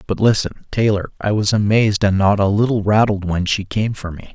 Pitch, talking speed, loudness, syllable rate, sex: 105 Hz, 220 wpm, -17 LUFS, 5.5 syllables/s, male